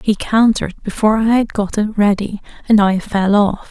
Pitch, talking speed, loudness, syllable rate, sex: 210 Hz, 180 wpm, -15 LUFS, 5.1 syllables/s, female